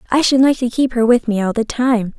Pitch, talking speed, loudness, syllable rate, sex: 240 Hz, 300 wpm, -15 LUFS, 5.7 syllables/s, female